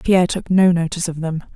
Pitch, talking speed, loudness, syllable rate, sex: 175 Hz, 230 wpm, -18 LUFS, 6.5 syllables/s, female